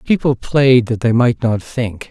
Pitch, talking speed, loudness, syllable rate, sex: 120 Hz, 200 wpm, -15 LUFS, 4.0 syllables/s, male